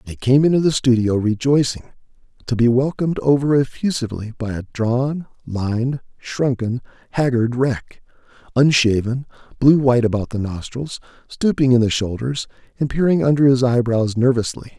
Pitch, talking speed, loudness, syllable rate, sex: 125 Hz, 135 wpm, -18 LUFS, 5.1 syllables/s, male